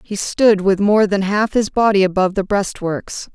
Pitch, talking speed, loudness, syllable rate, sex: 200 Hz, 195 wpm, -16 LUFS, 4.7 syllables/s, female